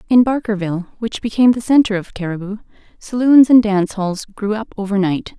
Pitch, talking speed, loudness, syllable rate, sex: 210 Hz, 165 wpm, -16 LUFS, 5.9 syllables/s, female